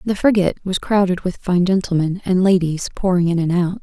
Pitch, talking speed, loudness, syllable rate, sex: 185 Hz, 205 wpm, -18 LUFS, 5.7 syllables/s, female